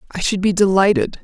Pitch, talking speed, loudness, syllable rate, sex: 195 Hz, 195 wpm, -16 LUFS, 6.0 syllables/s, female